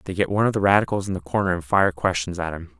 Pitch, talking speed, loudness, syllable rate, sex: 90 Hz, 300 wpm, -22 LUFS, 7.2 syllables/s, male